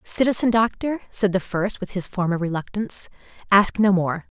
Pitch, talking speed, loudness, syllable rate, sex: 200 Hz, 165 wpm, -21 LUFS, 5.2 syllables/s, female